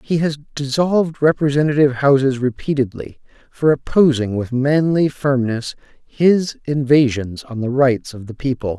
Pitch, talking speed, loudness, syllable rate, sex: 135 Hz, 130 wpm, -17 LUFS, 4.7 syllables/s, male